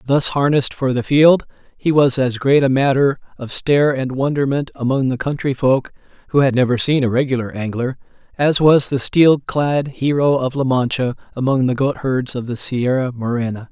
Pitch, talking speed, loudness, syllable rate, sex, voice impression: 135 Hz, 185 wpm, -17 LUFS, 5.1 syllables/s, male, masculine, adult-like, slightly clear, slightly fluent, slightly refreshing, sincere